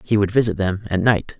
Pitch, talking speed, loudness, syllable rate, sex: 105 Hz, 260 wpm, -19 LUFS, 5.6 syllables/s, male